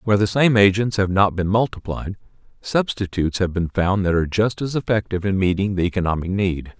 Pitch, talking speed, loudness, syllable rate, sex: 100 Hz, 195 wpm, -20 LUFS, 5.9 syllables/s, male